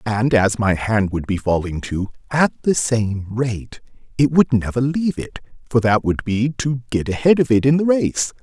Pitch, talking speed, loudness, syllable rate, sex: 120 Hz, 190 wpm, -19 LUFS, 4.6 syllables/s, male